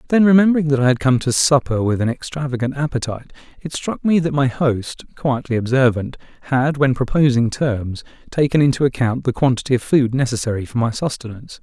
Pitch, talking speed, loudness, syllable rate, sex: 130 Hz, 180 wpm, -18 LUFS, 5.8 syllables/s, male